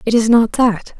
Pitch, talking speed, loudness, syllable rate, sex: 225 Hz, 240 wpm, -14 LUFS, 4.7 syllables/s, female